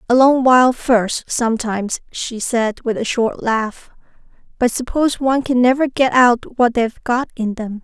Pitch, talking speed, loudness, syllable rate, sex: 240 Hz, 175 wpm, -17 LUFS, 4.7 syllables/s, female